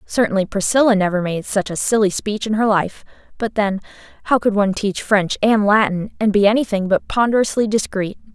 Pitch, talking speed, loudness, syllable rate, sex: 205 Hz, 185 wpm, -18 LUFS, 5.6 syllables/s, female